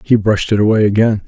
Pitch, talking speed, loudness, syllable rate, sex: 105 Hz, 235 wpm, -13 LUFS, 7.0 syllables/s, male